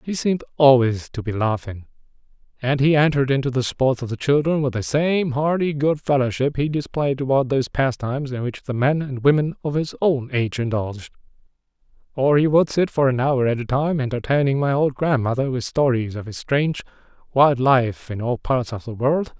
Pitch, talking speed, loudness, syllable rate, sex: 135 Hz, 200 wpm, -20 LUFS, 5.4 syllables/s, male